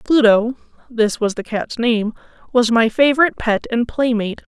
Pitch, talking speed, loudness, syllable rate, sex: 235 Hz, 130 wpm, -17 LUFS, 5.0 syllables/s, female